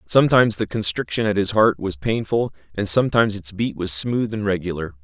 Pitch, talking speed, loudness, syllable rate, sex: 100 Hz, 190 wpm, -20 LUFS, 5.9 syllables/s, male